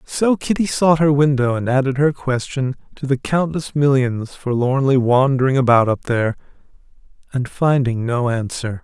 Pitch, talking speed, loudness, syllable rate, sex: 135 Hz, 150 wpm, -18 LUFS, 4.7 syllables/s, male